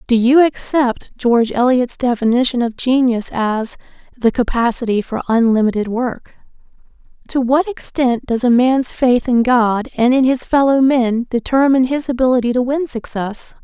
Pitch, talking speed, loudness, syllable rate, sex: 245 Hz, 150 wpm, -15 LUFS, 4.7 syllables/s, female